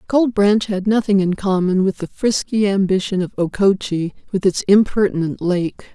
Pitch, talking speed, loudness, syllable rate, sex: 195 Hz, 160 wpm, -18 LUFS, 4.9 syllables/s, female